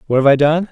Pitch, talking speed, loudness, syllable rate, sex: 150 Hz, 335 wpm, -13 LUFS, 7.3 syllables/s, male